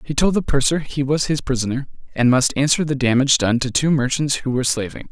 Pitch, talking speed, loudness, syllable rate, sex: 135 Hz, 235 wpm, -19 LUFS, 6.1 syllables/s, male